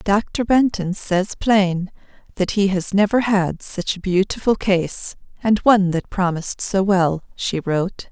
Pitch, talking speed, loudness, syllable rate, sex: 195 Hz, 155 wpm, -19 LUFS, 4.2 syllables/s, female